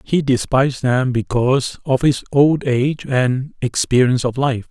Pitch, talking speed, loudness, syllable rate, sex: 130 Hz, 155 wpm, -17 LUFS, 4.6 syllables/s, male